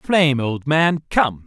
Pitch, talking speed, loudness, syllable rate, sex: 145 Hz, 165 wpm, -18 LUFS, 3.8 syllables/s, male